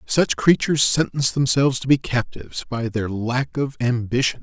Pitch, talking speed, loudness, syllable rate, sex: 125 Hz, 165 wpm, -20 LUFS, 5.2 syllables/s, male